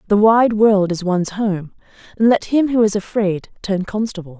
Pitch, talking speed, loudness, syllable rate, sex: 205 Hz, 190 wpm, -17 LUFS, 4.9 syllables/s, female